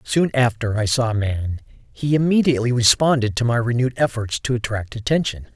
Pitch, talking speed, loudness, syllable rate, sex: 120 Hz, 175 wpm, -20 LUFS, 5.5 syllables/s, male